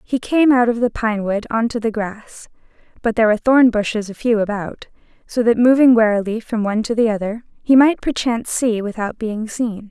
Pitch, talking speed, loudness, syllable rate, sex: 225 Hz, 200 wpm, -17 LUFS, 5.5 syllables/s, female